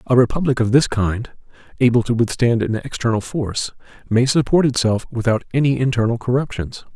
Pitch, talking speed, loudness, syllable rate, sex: 120 Hz, 155 wpm, -19 LUFS, 5.7 syllables/s, male